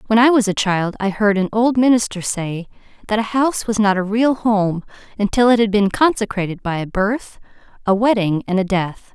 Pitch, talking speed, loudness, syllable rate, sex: 210 Hz, 210 wpm, -17 LUFS, 5.2 syllables/s, female